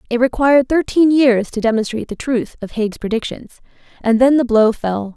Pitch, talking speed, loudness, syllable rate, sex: 240 Hz, 185 wpm, -16 LUFS, 5.3 syllables/s, female